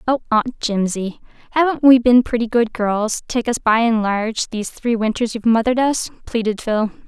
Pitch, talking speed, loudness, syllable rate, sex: 230 Hz, 185 wpm, -18 LUFS, 5.3 syllables/s, female